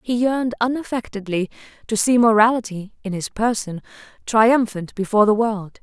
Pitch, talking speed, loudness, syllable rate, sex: 220 Hz, 135 wpm, -19 LUFS, 5.0 syllables/s, female